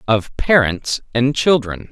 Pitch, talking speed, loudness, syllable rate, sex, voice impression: 120 Hz, 125 wpm, -17 LUFS, 3.6 syllables/s, male, masculine, adult-like, slightly refreshing, sincere, lively